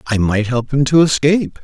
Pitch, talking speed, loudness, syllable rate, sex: 135 Hz, 220 wpm, -15 LUFS, 5.4 syllables/s, male